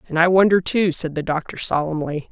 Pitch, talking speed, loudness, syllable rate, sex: 165 Hz, 210 wpm, -19 LUFS, 5.6 syllables/s, female